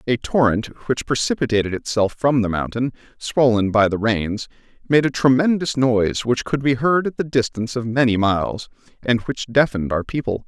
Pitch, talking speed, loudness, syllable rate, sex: 120 Hz, 180 wpm, -20 LUFS, 5.2 syllables/s, male